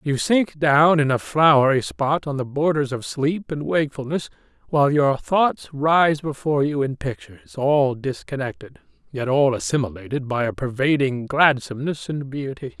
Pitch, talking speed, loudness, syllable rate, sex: 140 Hz, 155 wpm, -21 LUFS, 4.8 syllables/s, male